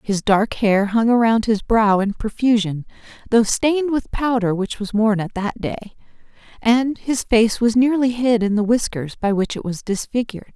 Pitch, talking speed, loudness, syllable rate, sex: 220 Hz, 190 wpm, -19 LUFS, 4.7 syllables/s, female